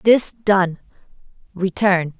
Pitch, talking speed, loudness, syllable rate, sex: 190 Hz, 80 wpm, -18 LUFS, 3.0 syllables/s, female